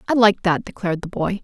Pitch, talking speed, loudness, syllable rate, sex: 195 Hz, 250 wpm, -20 LUFS, 6.4 syllables/s, female